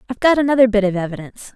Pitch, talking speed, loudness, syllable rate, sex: 225 Hz, 230 wpm, -16 LUFS, 8.8 syllables/s, female